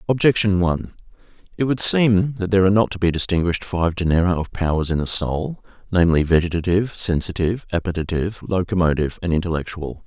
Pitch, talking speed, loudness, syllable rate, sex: 90 Hz, 150 wpm, -20 LUFS, 6.5 syllables/s, male